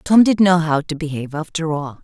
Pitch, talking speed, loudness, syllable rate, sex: 160 Hz, 235 wpm, -18 LUFS, 5.5 syllables/s, female